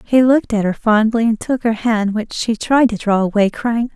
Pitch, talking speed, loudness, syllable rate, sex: 225 Hz, 245 wpm, -16 LUFS, 5.0 syllables/s, female